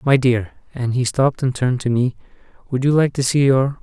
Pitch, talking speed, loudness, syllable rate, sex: 130 Hz, 235 wpm, -18 LUFS, 5.7 syllables/s, male